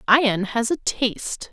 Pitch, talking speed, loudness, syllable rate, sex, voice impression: 240 Hz, 160 wpm, -21 LUFS, 4.4 syllables/s, female, very feminine, slightly middle-aged, very thin, very tensed, very powerful, very bright, very hard, very clear, very fluent, raspy, slightly cool, slightly intellectual, slightly refreshing, slightly sincere, slightly calm, slightly friendly, slightly reassuring, very unique, very wild, very strict, very intense, very sharp